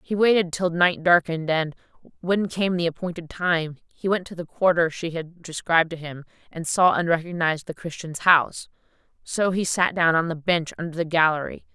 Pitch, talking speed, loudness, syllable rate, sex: 170 Hz, 195 wpm, -23 LUFS, 5.4 syllables/s, female